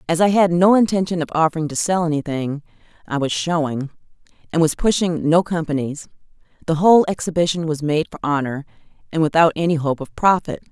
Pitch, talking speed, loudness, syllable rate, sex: 160 Hz, 175 wpm, -19 LUFS, 6.0 syllables/s, female